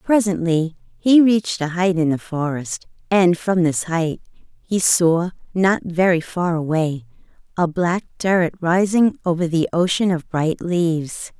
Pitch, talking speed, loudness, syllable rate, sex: 175 Hz, 145 wpm, -19 LUFS, 4.0 syllables/s, female